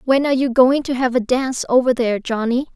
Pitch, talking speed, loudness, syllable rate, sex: 250 Hz, 240 wpm, -17 LUFS, 6.3 syllables/s, female